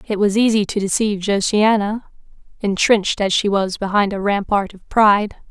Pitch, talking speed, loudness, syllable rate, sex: 205 Hz, 165 wpm, -17 LUFS, 5.2 syllables/s, female